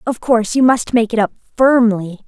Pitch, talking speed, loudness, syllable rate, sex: 230 Hz, 210 wpm, -15 LUFS, 5.4 syllables/s, female